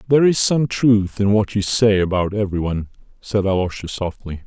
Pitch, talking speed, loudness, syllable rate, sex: 100 Hz, 190 wpm, -18 LUFS, 5.6 syllables/s, male